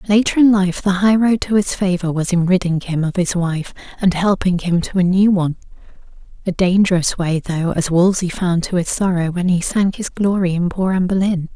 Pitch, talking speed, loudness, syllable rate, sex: 185 Hz, 215 wpm, -17 LUFS, 5.4 syllables/s, female